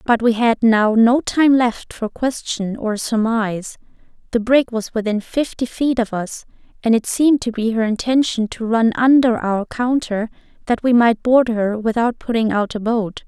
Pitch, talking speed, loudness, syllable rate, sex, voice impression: 230 Hz, 180 wpm, -18 LUFS, 4.5 syllables/s, female, feminine, slightly young, tensed, slightly bright, soft, cute, calm, friendly, reassuring, sweet, kind, modest